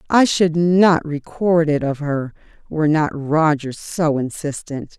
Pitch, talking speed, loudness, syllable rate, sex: 155 Hz, 145 wpm, -18 LUFS, 3.8 syllables/s, female